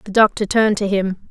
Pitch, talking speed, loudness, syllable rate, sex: 205 Hz, 230 wpm, -17 LUFS, 6.0 syllables/s, female